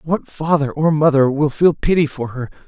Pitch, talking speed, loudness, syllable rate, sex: 145 Hz, 200 wpm, -17 LUFS, 4.8 syllables/s, male